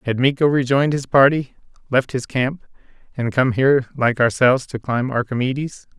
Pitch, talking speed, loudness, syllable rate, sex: 130 Hz, 160 wpm, -18 LUFS, 5.4 syllables/s, male